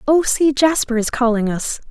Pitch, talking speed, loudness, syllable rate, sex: 255 Hz, 190 wpm, -17 LUFS, 4.7 syllables/s, female